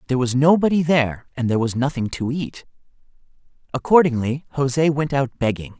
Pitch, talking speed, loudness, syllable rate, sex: 135 Hz, 155 wpm, -20 LUFS, 5.8 syllables/s, male